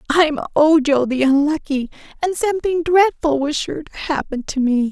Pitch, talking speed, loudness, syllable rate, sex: 300 Hz, 160 wpm, -18 LUFS, 4.8 syllables/s, female